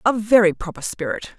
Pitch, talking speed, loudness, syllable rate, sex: 195 Hz, 175 wpm, -19 LUFS, 5.9 syllables/s, female